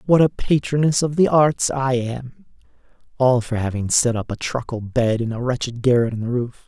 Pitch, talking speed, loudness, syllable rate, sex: 125 Hz, 205 wpm, -20 LUFS, 5.0 syllables/s, male